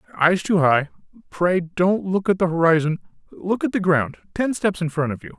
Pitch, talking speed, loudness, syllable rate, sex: 175 Hz, 210 wpm, -21 LUFS, 5.0 syllables/s, male